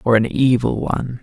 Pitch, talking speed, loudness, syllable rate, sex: 120 Hz, 195 wpm, -18 LUFS, 5.3 syllables/s, male